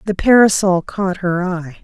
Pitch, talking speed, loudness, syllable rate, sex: 185 Hz, 165 wpm, -15 LUFS, 4.3 syllables/s, female